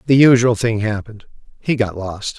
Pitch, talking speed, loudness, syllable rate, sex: 115 Hz, 175 wpm, -17 LUFS, 5.3 syllables/s, male